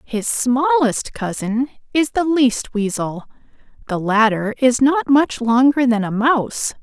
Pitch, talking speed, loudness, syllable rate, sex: 245 Hz, 140 wpm, -17 LUFS, 3.8 syllables/s, female